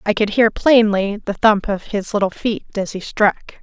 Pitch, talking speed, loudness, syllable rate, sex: 210 Hz, 215 wpm, -17 LUFS, 4.9 syllables/s, female